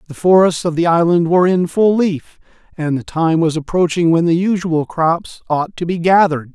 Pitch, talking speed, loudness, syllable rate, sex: 170 Hz, 200 wpm, -15 LUFS, 5.1 syllables/s, male